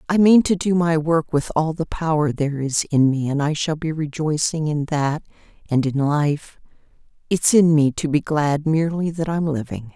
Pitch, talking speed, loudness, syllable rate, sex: 155 Hz, 200 wpm, -20 LUFS, 4.8 syllables/s, female